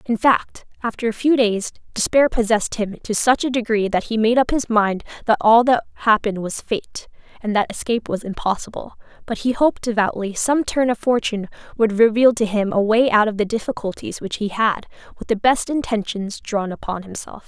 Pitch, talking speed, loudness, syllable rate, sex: 220 Hz, 200 wpm, -19 LUFS, 5.4 syllables/s, female